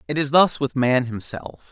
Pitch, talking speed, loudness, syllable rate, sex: 135 Hz, 210 wpm, -20 LUFS, 4.6 syllables/s, male